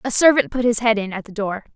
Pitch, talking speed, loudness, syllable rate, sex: 220 Hz, 305 wpm, -19 LUFS, 6.3 syllables/s, female